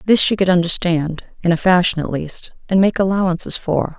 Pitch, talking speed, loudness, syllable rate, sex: 180 Hz, 195 wpm, -17 LUFS, 5.3 syllables/s, female